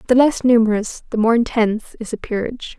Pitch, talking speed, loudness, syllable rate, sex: 230 Hz, 195 wpm, -18 LUFS, 6.4 syllables/s, female